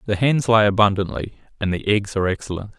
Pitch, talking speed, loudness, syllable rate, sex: 105 Hz, 195 wpm, -20 LUFS, 6.3 syllables/s, male